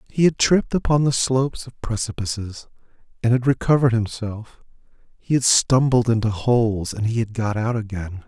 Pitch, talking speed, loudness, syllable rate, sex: 115 Hz, 160 wpm, -20 LUFS, 5.2 syllables/s, male